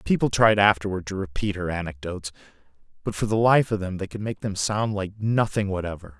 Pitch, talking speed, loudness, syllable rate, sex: 100 Hz, 205 wpm, -24 LUFS, 5.8 syllables/s, male